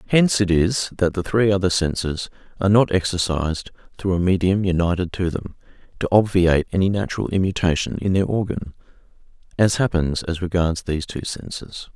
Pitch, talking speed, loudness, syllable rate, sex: 90 Hz, 160 wpm, -21 LUFS, 5.6 syllables/s, male